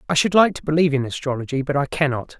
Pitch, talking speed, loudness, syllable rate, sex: 145 Hz, 250 wpm, -20 LUFS, 7.2 syllables/s, male